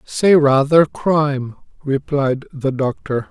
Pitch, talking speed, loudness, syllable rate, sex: 140 Hz, 110 wpm, -17 LUFS, 3.5 syllables/s, male